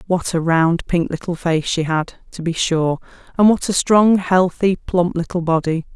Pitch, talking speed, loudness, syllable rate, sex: 175 Hz, 190 wpm, -18 LUFS, 4.4 syllables/s, female